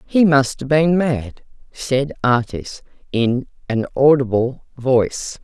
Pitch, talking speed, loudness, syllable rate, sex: 130 Hz, 120 wpm, -18 LUFS, 3.5 syllables/s, female